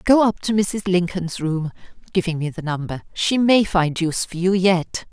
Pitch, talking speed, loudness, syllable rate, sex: 180 Hz, 175 wpm, -20 LUFS, 4.6 syllables/s, female